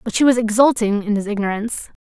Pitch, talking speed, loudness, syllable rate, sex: 220 Hz, 205 wpm, -18 LUFS, 6.5 syllables/s, female